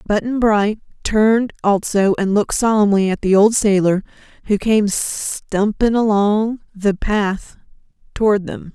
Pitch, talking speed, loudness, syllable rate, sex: 205 Hz, 130 wpm, -17 LUFS, 4.1 syllables/s, female